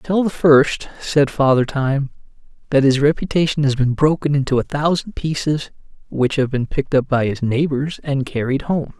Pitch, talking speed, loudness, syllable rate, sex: 140 Hz, 180 wpm, -18 LUFS, 4.9 syllables/s, male